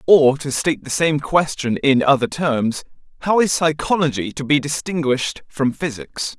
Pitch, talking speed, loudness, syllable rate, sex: 145 Hz, 160 wpm, -19 LUFS, 4.7 syllables/s, male